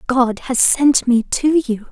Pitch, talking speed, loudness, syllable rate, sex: 255 Hz, 190 wpm, -15 LUFS, 3.6 syllables/s, female